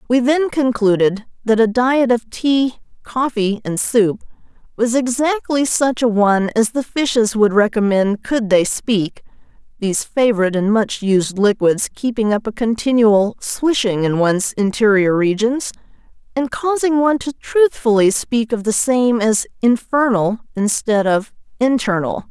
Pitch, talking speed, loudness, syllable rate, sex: 225 Hz, 145 wpm, -16 LUFS, 4.4 syllables/s, female